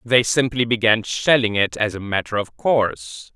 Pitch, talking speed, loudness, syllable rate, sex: 110 Hz, 180 wpm, -19 LUFS, 4.6 syllables/s, male